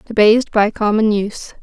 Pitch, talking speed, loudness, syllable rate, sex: 215 Hz, 150 wpm, -15 LUFS, 5.7 syllables/s, female